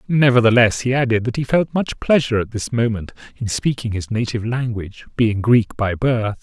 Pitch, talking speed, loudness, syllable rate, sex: 115 Hz, 185 wpm, -18 LUFS, 5.4 syllables/s, male